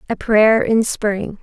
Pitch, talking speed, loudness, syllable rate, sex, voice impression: 215 Hz, 170 wpm, -16 LUFS, 3.2 syllables/s, female, feminine, slightly young, slightly cute, slightly sincere, slightly calm, friendly